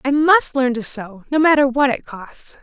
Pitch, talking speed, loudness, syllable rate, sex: 265 Hz, 230 wpm, -16 LUFS, 4.5 syllables/s, female